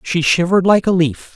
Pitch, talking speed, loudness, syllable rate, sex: 175 Hz, 220 wpm, -14 LUFS, 5.6 syllables/s, male